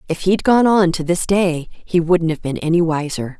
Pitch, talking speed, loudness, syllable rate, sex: 170 Hz, 230 wpm, -17 LUFS, 4.8 syllables/s, female